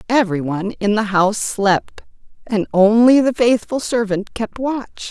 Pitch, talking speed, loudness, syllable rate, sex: 215 Hz, 140 wpm, -17 LUFS, 4.3 syllables/s, female